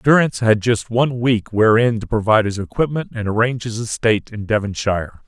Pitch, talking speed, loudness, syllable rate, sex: 110 Hz, 180 wpm, -18 LUFS, 6.1 syllables/s, male